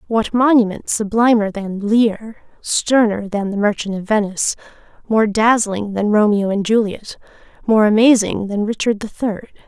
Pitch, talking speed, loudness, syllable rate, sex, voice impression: 215 Hz, 145 wpm, -16 LUFS, 4.5 syllables/s, female, slightly feminine, young, slightly fluent, cute, friendly, slightly kind